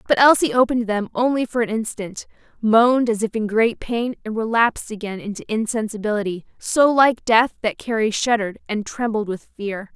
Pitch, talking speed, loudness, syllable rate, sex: 225 Hz, 175 wpm, -20 LUFS, 5.3 syllables/s, female